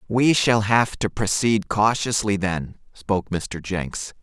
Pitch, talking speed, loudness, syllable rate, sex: 105 Hz, 140 wpm, -22 LUFS, 3.7 syllables/s, male